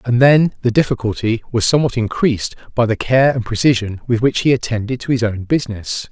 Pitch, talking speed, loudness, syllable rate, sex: 120 Hz, 195 wpm, -16 LUFS, 5.9 syllables/s, male